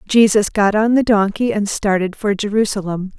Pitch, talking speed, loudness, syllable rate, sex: 205 Hz, 170 wpm, -16 LUFS, 5.0 syllables/s, female